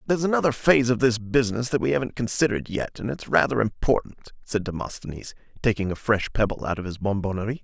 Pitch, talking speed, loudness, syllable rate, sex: 115 Hz, 195 wpm, -24 LUFS, 6.8 syllables/s, male